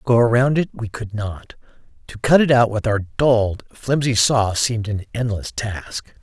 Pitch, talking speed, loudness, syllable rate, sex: 115 Hz, 185 wpm, -19 LUFS, 4.4 syllables/s, male